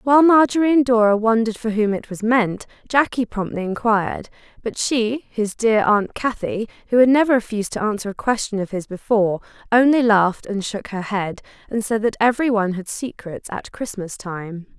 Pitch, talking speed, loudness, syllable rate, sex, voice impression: 220 Hz, 180 wpm, -20 LUFS, 5.3 syllables/s, female, feminine, adult-like, tensed, bright, fluent, intellectual, calm, friendly, reassuring, elegant, kind, slightly modest